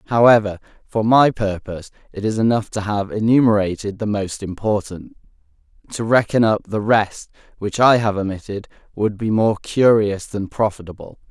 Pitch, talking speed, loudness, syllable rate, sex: 105 Hz, 150 wpm, -18 LUFS, 5.0 syllables/s, male